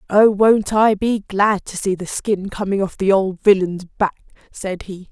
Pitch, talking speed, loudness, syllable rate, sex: 195 Hz, 200 wpm, -18 LUFS, 4.1 syllables/s, female